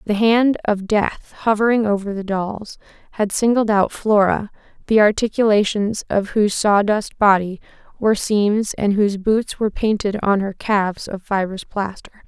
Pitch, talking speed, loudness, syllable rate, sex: 205 Hz, 150 wpm, -18 LUFS, 4.7 syllables/s, female